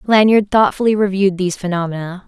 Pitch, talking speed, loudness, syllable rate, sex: 195 Hz, 130 wpm, -15 LUFS, 6.5 syllables/s, female